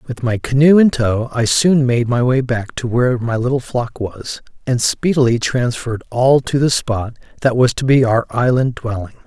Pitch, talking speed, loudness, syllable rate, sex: 125 Hz, 200 wpm, -16 LUFS, 4.8 syllables/s, male